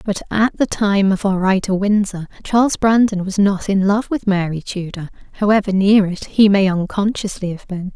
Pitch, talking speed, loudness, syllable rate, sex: 200 Hz, 195 wpm, -17 LUFS, 4.9 syllables/s, female